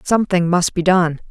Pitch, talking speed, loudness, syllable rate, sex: 180 Hz, 185 wpm, -16 LUFS, 5.3 syllables/s, female